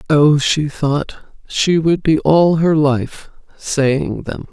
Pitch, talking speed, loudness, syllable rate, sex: 150 Hz, 145 wpm, -15 LUFS, 3.0 syllables/s, female